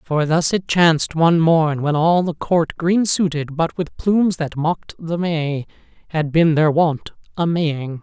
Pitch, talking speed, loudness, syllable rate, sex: 160 Hz, 185 wpm, -18 LUFS, 4.0 syllables/s, male